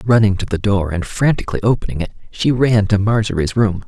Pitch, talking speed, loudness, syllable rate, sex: 105 Hz, 200 wpm, -17 LUFS, 5.9 syllables/s, male